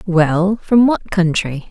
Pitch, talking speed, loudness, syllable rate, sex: 185 Hz, 105 wpm, -15 LUFS, 3.3 syllables/s, female